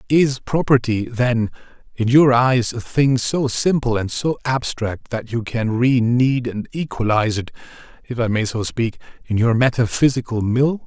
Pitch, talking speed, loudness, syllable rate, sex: 120 Hz, 165 wpm, -19 LUFS, 4.4 syllables/s, male